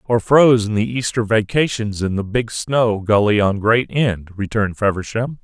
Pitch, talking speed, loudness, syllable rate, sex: 110 Hz, 175 wpm, -17 LUFS, 4.7 syllables/s, male